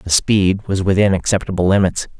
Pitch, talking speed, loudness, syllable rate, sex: 95 Hz, 165 wpm, -16 LUFS, 5.3 syllables/s, male